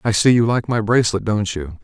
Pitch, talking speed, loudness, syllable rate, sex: 110 Hz, 260 wpm, -18 LUFS, 5.8 syllables/s, male